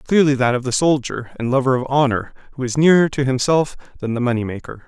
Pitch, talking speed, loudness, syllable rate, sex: 135 Hz, 220 wpm, -18 LUFS, 6.1 syllables/s, male